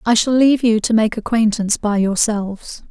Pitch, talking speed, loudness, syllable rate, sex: 220 Hz, 185 wpm, -16 LUFS, 5.5 syllables/s, female